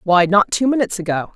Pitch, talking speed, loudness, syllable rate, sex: 200 Hz, 220 wpm, -17 LUFS, 6.4 syllables/s, female